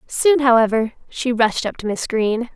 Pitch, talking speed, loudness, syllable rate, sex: 240 Hz, 190 wpm, -18 LUFS, 4.5 syllables/s, female